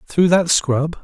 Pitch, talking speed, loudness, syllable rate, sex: 160 Hz, 175 wpm, -16 LUFS, 3.4 syllables/s, male